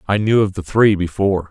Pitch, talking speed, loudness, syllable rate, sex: 100 Hz, 240 wpm, -16 LUFS, 5.9 syllables/s, male